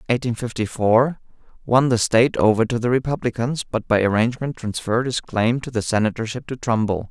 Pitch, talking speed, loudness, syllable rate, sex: 120 Hz, 170 wpm, -20 LUFS, 5.8 syllables/s, male